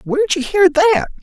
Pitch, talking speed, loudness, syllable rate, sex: 230 Hz, 195 wpm, -14 LUFS, 6.5 syllables/s, male